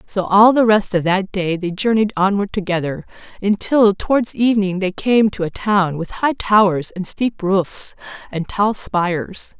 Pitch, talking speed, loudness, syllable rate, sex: 200 Hz, 175 wpm, -17 LUFS, 4.4 syllables/s, female